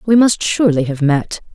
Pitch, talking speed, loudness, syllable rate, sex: 180 Hz, 195 wpm, -15 LUFS, 5.3 syllables/s, female